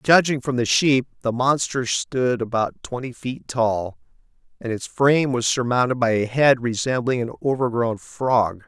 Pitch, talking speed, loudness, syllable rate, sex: 125 Hz, 160 wpm, -21 LUFS, 4.4 syllables/s, male